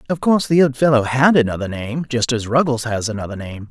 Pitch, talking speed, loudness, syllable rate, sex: 125 Hz, 225 wpm, -17 LUFS, 6.0 syllables/s, male